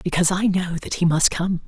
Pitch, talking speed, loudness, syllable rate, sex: 175 Hz, 250 wpm, -20 LUFS, 6.5 syllables/s, female